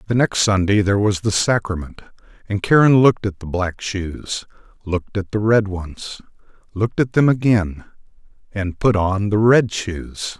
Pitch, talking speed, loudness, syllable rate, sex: 100 Hz, 160 wpm, -18 LUFS, 4.6 syllables/s, male